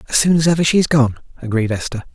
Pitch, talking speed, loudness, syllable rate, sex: 140 Hz, 225 wpm, -16 LUFS, 6.7 syllables/s, male